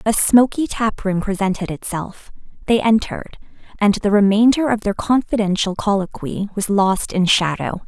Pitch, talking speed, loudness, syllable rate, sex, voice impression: 205 Hz, 145 wpm, -18 LUFS, 4.8 syllables/s, female, very feminine, slightly young, slightly adult-like, thin, very tensed, powerful, very bright, hard, very clear, very fluent, cute, slightly cool, intellectual, very refreshing, sincere, calm, very friendly, reassuring, very unique, elegant, wild, sweet, very lively, strict, intense, slightly sharp, light